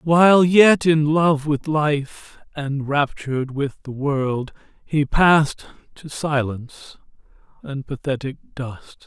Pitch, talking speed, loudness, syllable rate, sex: 145 Hz, 120 wpm, -19 LUFS, 3.5 syllables/s, male